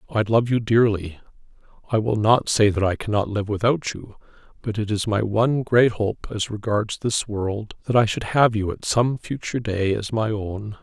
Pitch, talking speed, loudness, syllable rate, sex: 110 Hz, 205 wpm, -22 LUFS, 4.8 syllables/s, male